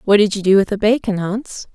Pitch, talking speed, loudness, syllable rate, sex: 205 Hz, 275 wpm, -16 LUFS, 5.7 syllables/s, female